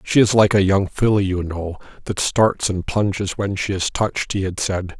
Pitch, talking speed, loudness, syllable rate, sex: 95 Hz, 230 wpm, -19 LUFS, 4.8 syllables/s, male